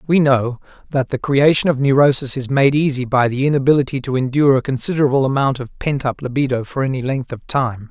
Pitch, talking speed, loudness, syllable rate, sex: 135 Hz, 205 wpm, -17 LUFS, 6.1 syllables/s, male